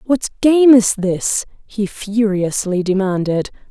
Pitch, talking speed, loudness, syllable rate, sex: 210 Hz, 115 wpm, -16 LUFS, 3.5 syllables/s, female